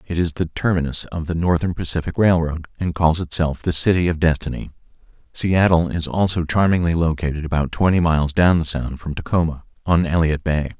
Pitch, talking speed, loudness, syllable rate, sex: 80 Hz, 180 wpm, -19 LUFS, 5.6 syllables/s, male